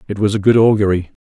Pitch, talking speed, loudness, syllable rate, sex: 105 Hz, 245 wpm, -14 LUFS, 7.3 syllables/s, male